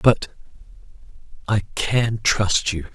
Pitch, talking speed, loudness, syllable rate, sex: 105 Hz, 80 wpm, -21 LUFS, 2.9 syllables/s, male